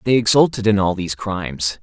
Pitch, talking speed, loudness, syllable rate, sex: 105 Hz, 195 wpm, -18 LUFS, 5.9 syllables/s, male